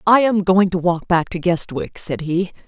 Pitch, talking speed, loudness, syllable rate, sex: 180 Hz, 225 wpm, -18 LUFS, 4.5 syllables/s, female